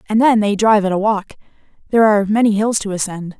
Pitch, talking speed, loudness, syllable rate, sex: 210 Hz, 230 wpm, -15 LUFS, 7.1 syllables/s, female